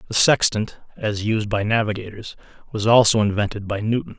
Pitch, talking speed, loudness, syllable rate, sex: 110 Hz, 160 wpm, -20 LUFS, 5.4 syllables/s, male